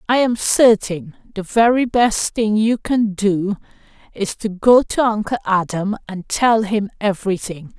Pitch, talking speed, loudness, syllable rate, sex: 210 Hz, 155 wpm, -17 LUFS, 4.1 syllables/s, female